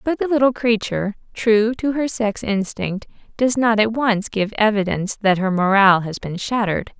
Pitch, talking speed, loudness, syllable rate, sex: 215 Hz, 180 wpm, -19 LUFS, 5.0 syllables/s, female